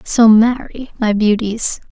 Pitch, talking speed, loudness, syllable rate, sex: 225 Hz, 125 wpm, -14 LUFS, 3.7 syllables/s, female